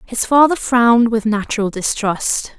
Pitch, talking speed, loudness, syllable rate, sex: 230 Hz, 140 wpm, -15 LUFS, 4.5 syllables/s, female